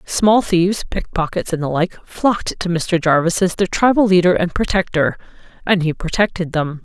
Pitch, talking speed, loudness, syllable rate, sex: 180 Hz, 175 wpm, -17 LUFS, 5.0 syllables/s, female